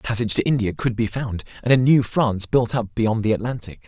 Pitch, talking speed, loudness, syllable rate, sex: 115 Hz, 250 wpm, -21 LUFS, 6.1 syllables/s, male